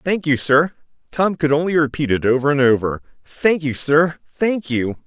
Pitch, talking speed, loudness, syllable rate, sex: 150 Hz, 155 wpm, -18 LUFS, 4.6 syllables/s, male